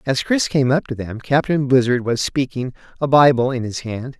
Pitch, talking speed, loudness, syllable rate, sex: 130 Hz, 215 wpm, -18 LUFS, 5.0 syllables/s, male